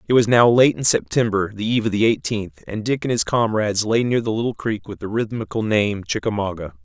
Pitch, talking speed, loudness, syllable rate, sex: 110 Hz, 230 wpm, -20 LUFS, 5.8 syllables/s, male